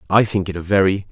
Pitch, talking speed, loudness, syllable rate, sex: 95 Hz, 270 wpm, -18 LUFS, 6.9 syllables/s, male